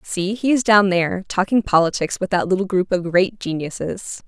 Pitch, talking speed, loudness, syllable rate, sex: 190 Hz, 195 wpm, -19 LUFS, 5.1 syllables/s, female